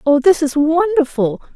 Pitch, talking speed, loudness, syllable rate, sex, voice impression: 310 Hz, 155 wpm, -15 LUFS, 4.6 syllables/s, female, feminine, middle-aged, slightly relaxed, powerful, bright, soft, muffled, slightly calm, friendly, reassuring, elegant, lively, kind